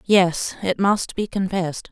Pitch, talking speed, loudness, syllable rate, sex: 185 Hz, 155 wpm, -21 LUFS, 4.0 syllables/s, female